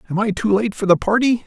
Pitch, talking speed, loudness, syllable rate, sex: 210 Hz, 285 wpm, -18 LUFS, 6.4 syllables/s, male